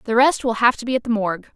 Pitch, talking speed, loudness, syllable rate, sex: 235 Hz, 350 wpm, -19 LUFS, 7.1 syllables/s, female